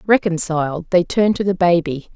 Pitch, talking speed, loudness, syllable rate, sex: 175 Hz, 165 wpm, -17 LUFS, 5.5 syllables/s, female